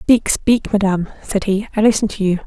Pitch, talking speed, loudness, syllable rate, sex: 205 Hz, 220 wpm, -17 LUFS, 5.5 syllables/s, female